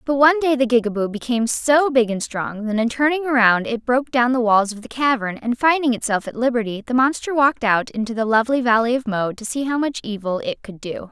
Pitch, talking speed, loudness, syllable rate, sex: 240 Hz, 245 wpm, -19 LUFS, 6.0 syllables/s, female